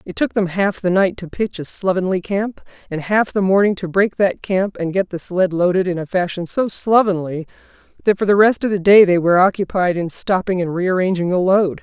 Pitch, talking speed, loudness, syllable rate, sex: 190 Hz, 225 wpm, -17 LUFS, 5.2 syllables/s, female